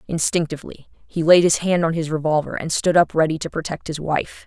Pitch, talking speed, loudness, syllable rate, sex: 160 Hz, 215 wpm, -20 LUFS, 5.6 syllables/s, female